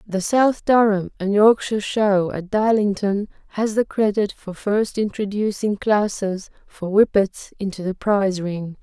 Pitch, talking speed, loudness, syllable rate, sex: 205 Hz, 145 wpm, -20 LUFS, 4.2 syllables/s, female